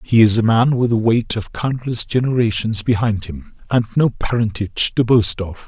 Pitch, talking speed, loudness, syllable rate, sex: 115 Hz, 190 wpm, -17 LUFS, 4.9 syllables/s, male